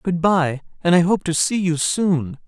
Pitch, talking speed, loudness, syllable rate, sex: 170 Hz, 220 wpm, -19 LUFS, 4.2 syllables/s, male